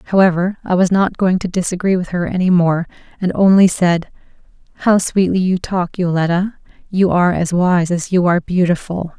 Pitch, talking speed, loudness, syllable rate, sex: 180 Hz, 175 wpm, -16 LUFS, 5.2 syllables/s, female